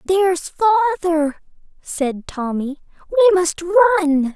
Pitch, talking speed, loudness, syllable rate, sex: 345 Hz, 95 wpm, -17 LUFS, 3.7 syllables/s, female